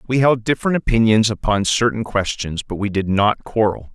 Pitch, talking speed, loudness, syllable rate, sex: 110 Hz, 185 wpm, -18 LUFS, 5.3 syllables/s, male